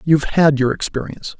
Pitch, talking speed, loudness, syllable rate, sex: 145 Hz, 170 wpm, -17 LUFS, 6.2 syllables/s, male